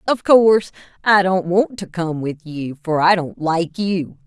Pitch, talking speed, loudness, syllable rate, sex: 180 Hz, 195 wpm, -18 LUFS, 4.0 syllables/s, female